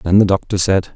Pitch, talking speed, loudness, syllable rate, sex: 95 Hz, 250 wpm, -15 LUFS, 5.5 syllables/s, male